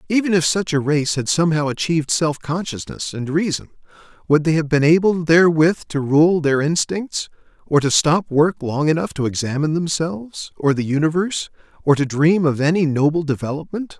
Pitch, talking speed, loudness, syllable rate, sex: 155 Hz, 175 wpm, -18 LUFS, 5.4 syllables/s, male